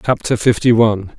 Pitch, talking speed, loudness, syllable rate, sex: 110 Hz, 150 wpm, -14 LUFS, 5.6 syllables/s, male